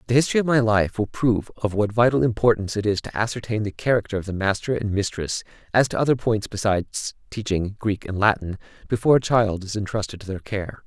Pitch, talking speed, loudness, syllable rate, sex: 105 Hz, 215 wpm, -23 LUFS, 6.2 syllables/s, male